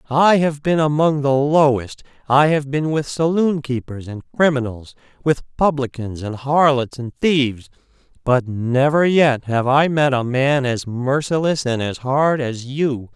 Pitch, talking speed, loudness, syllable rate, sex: 135 Hz, 145 wpm, -18 LUFS, 4.1 syllables/s, male